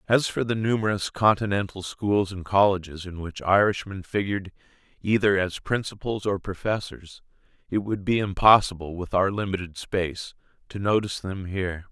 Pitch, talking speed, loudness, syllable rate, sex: 100 Hz, 145 wpm, -25 LUFS, 5.2 syllables/s, male